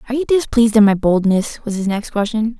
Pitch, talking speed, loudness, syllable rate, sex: 220 Hz, 230 wpm, -16 LUFS, 6.4 syllables/s, female